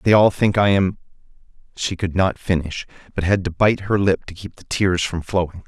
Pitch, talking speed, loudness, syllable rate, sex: 95 Hz, 220 wpm, -20 LUFS, 5.1 syllables/s, male